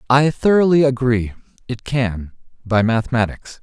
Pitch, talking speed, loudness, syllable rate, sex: 125 Hz, 100 wpm, -17 LUFS, 4.7 syllables/s, male